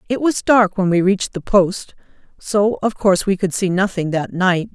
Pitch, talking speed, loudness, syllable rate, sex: 195 Hz, 215 wpm, -17 LUFS, 4.8 syllables/s, female